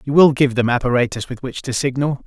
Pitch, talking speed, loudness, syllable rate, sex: 130 Hz, 240 wpm, -18 LUFS, 6.1 syllables/s, male